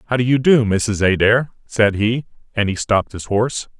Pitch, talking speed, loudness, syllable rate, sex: 110 Hz, 205 wpm, -17 LUFS, 5.2 syllables/s, male